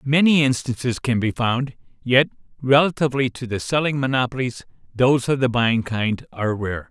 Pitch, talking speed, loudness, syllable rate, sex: 125 Hz, 155 wpm, -20 LUFS, 5.2 syllables/s, male